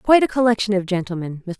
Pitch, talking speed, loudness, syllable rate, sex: 205 Hz, 190 wpm, -20 LUFS, 7.3 syllables/s, female